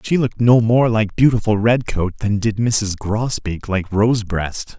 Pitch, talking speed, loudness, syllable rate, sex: 110 Hz, 165 wpm, -18 LUFS, 4.4 syllables/s, male